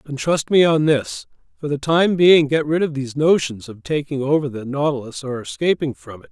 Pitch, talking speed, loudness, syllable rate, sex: 145 Hz, 220 wpm, -19 LUFS, 5.3 syllables/s, male